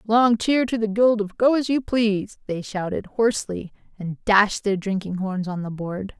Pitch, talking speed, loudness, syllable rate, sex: 210 Hz, 205 wpm, -22 LUFS, 4.6 syllables/s, female